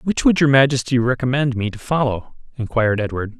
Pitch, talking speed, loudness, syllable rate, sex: 125 Hz, 175 wpm, -18 LUFS, 5.8 syllables/s, male